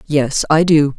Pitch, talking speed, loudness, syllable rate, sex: 150 Hz, 185 wpm, -14 LUFS, 3.7 syllables/s, female